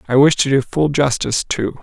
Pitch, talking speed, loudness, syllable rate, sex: 135 Hz, 230 wpm, -16 LUFS, 5.5 syllables/s, male